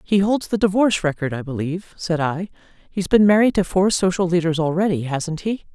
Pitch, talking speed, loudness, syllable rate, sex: 180 Hz, 200 wpm, -20 LUFS, 5.6 syllables/s, female